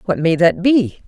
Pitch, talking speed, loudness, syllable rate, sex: 190 Hz, 225 wpm, -15 LUFS, 4.7 syllables/s, female